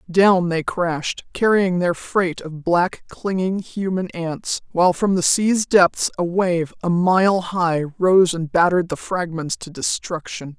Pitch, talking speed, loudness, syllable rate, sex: 175 Hz, 160 wpm, -19 LUFS, 3.8 syllables/s, female